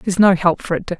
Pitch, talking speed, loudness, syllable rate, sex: 180 Hz, 360 wpm, -16 LUFS, 7.6 syllables/s, female